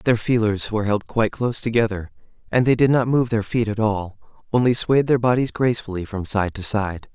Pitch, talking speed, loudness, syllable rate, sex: 110 Hz, 210 wpm, -21 LUFS, 5.7 syllables/s, male